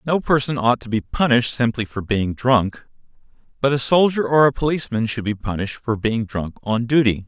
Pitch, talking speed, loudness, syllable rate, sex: 120 Hz, 200 wpm, -20 LUFS, 5.5 syllables/s, male